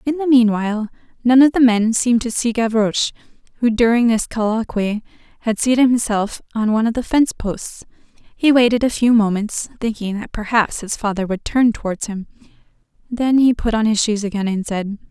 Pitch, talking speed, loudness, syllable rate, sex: 225 Hz, 185 wpm, -17 LUFS, 5.4 syllables/s, female